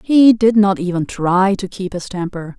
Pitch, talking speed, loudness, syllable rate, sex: 195 Hz, 210 wpm, -16 LUFS, 4.4 syllables/s, female